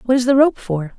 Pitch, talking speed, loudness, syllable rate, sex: 240 Hz, 305 wpm, -16 LUFS, 5.4 syllables/s, female